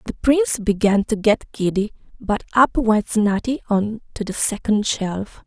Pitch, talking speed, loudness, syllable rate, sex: 215 Hz, 165 wpm, -20 LUFS, 4.2 syllables/s, female